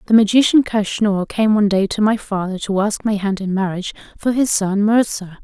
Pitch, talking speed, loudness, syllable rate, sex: 205 Hz, 210 wpm, -17 LUFS, 5.4 syllables/s, female